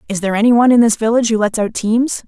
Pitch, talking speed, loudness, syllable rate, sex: 225 Hz, 290 wpm, -14 LUFS, 7.7 syllables/s, female